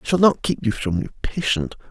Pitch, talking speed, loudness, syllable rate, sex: 135 Hz, 250 wpm, -22 LUFS, 6.0 syllables/s, male